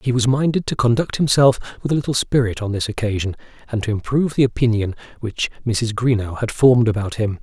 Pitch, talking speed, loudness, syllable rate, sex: 115 Hz, 200 wpm, -19 LUFS, 6.2 syllables/s, male